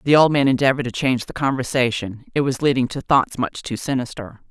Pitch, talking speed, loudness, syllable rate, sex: 130 Hz, 215 wpm, -20 LUFS, 6.1 syllables/s, female